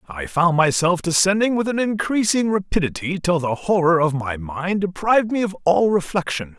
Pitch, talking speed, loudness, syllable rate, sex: 175 Hz, 175 wpm, -19 LUFS, 5.1 syllables/s, male